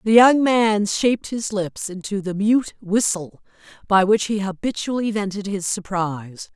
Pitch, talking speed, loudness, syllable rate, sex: 205 Hz, 155 wpm, -20 LUFS, 4.4 syllables/s, female